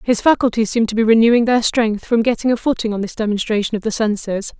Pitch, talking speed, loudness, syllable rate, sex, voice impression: 225 Hz, 235 wpm, -17 LUFS, 6.5 syllables/s, female, very feminine, middle-aged, very thin, very tensed, slightly powerful, very bright, very hard, very clear, very fluent, slightly raspy, cool, slightly intellectual, very refreshing, slightly sincere, slightly calm, slightly friendly, slightly reassuring, very unique, wild, slightly sweet, very lively, very strict, very intense, very sharp, very light